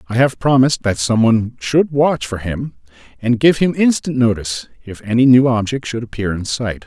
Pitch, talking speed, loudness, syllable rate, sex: 120 Hz, 190 wpm, -16 LUFS, 5.2 syllables/s, male